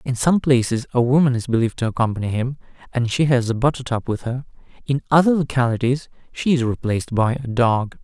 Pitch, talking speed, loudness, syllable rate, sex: 125 Hz, 200 wpm, -20 LUFS, 6.0 syllables/s, male